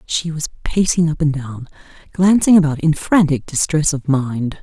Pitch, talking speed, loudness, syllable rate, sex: 155 Hz, 170 wpm, -16 LUFS, 4.4 syllables/s, female